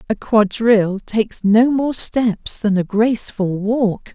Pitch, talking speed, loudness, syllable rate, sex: 220 Hz, 145 wpm, -17 LUFS, 3.8 syllables/s, female